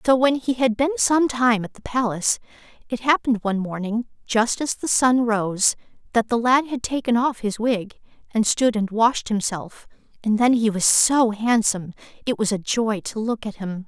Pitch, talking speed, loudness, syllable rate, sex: 230 Hz, 200 wpm, -21 LUFS, 4.8 syllables/s, female